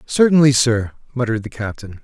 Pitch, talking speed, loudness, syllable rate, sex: 120 Hz, 150 wpm, -17 LUFS, 5.8 syllables/s, male